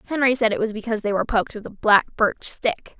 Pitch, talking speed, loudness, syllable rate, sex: 220 Hz, 260 wpm, -21 LUFS, 6.6 syllables/s, female